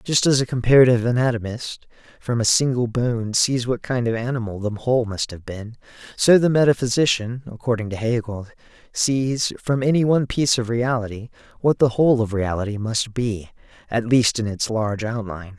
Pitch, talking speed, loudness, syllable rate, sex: 120 Hz, 170 wpm, -20 LUFS, 5.5 syllables/s, male